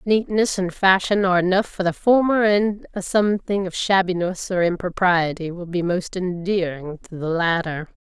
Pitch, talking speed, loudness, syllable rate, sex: 185 Hz, 165 wpm, -20 LUFS, 4.8 syllables/s, female